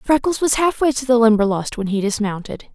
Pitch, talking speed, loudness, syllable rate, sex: 240 Hz, 195 wpm, -18 LUFS, 5.6 syllables/s, female